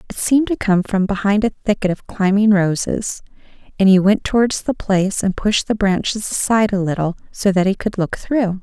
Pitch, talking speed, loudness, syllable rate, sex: 200 Hz, 210 wpm, -17 LUFS, 5.4 syllables/s, female